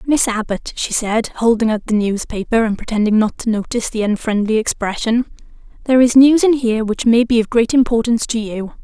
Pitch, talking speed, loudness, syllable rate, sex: 225 Hz, 195 wpm, -16 LUFS, 5.8 syllables/s, female